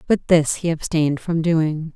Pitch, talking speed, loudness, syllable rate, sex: 160 Hz, 185 wpm, -19 LUFS, 4.4 syllables/s, female